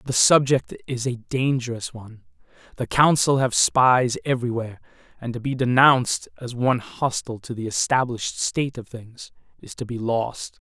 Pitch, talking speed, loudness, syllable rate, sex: 125 Hz, 160 wpm, -22 LUFS, 5.2 syllables/s, male